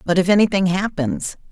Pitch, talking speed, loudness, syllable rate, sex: 185 Hz, 160 wpm, -18 LUFS, 5.4 syllables/s, female